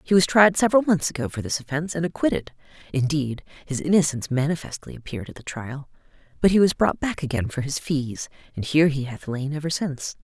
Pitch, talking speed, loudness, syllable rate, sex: 155 Hz, 205 wpm, -23 LUFS, 6.3 syllables/s, female